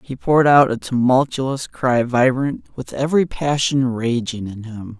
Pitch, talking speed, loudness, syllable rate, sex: 130 Hz, 155 wpm, -18 LUFS, 4.3 syllables/s, male